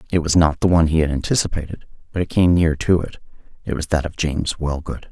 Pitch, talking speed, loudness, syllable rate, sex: 80 Hz, 235 wpm, -19 LUFS, 6.4 syllables/s, male